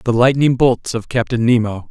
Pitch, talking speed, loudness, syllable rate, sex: 120 Hz, 190 wpm, -16 LUFS, 5.0 syllables/s, male